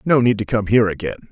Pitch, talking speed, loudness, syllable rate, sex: 110 Hz, 275 wpm, -18 LUFS, 7.5 syllables/s, male